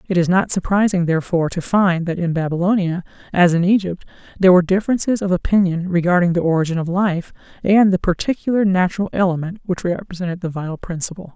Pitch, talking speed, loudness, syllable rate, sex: 180 Hz, 175 wpm, -18 LUFS, 6.5 syllables/s, female